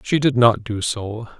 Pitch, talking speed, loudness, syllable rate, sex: 115 Hz, 215 wpm, -19 LUFS, 4.1 syllables/s, male